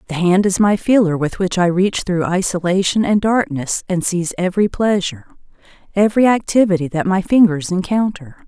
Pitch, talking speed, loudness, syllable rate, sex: 185 Hz, 165 wpm, -16 LUFS, 5.5 syllables/s, female